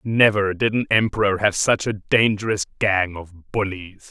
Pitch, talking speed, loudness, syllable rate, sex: 100 Hz, 160 wpm, -20 LUFS, 4.3 syllables/s, male